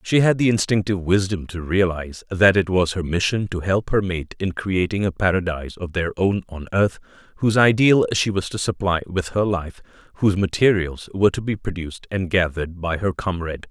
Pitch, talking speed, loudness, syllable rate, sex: 95 Hz, 195 wpm, -21 LUFS, 5.6 syllables/s, male